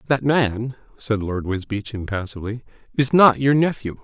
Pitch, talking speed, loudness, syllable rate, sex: 115 Hz, 150 wpm, -20 LUFS, 4.9 syllables/s, male